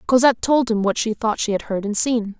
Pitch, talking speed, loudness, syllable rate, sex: 225 Hz, 275 wpm, -19 LUFS, 5.8 syllables/s, female